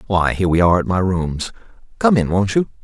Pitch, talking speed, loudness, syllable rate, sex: 100 Hz, 235 wpm, -17 LUFS, 6.2 syllables/s, male